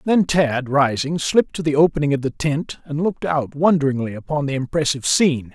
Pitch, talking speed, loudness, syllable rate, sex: 145 Hz, 195 wpm, -19 LUFS, 5.8 syllables/s, male